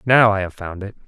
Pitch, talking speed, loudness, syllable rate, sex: 100 Hz, 280 wpm, -19 LUFS, 5.8 syllables/s, male